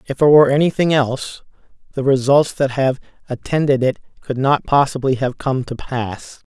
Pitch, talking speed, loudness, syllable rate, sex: 135 Hz, 165 wpm, -17 LUFS, 5.1 syllables/s, male